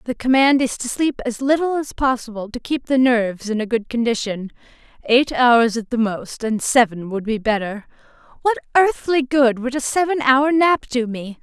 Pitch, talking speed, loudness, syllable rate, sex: 250 Hz, 190 wpm, -19 LUFS, 4.9 syllables/s, female